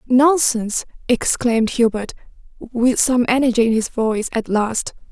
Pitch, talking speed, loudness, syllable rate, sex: 240 Hz, 130 wpm, -18 LUFS, 4.7 syllables/s, female